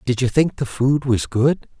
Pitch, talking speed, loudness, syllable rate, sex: 125 Hz, 235 wpm, -19 LUFS, 4.4 syllables/s, male